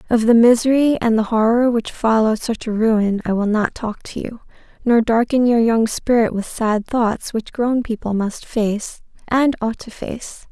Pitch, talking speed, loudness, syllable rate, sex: 230 Hz, 195 wpm, -18 LUFS, 4.3 syllables/s, female